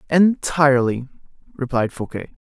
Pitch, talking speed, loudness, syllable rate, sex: 140 Hz, 75 wpm, -19 LUFS, 4.7 syllables/s, male